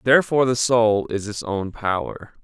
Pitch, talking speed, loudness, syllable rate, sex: 115 Hz, 170 wpm, -21 LUFS, 5.0 syllables/s, male